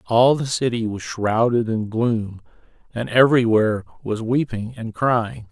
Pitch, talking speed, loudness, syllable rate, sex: 115 Hz, 140 wpm, -20 LUFS, 4.3 syllables/s, male